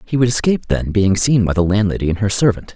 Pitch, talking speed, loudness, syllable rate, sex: 105 Hz, 260 wpm, -16 LUFS, 6.5 syllables/s, male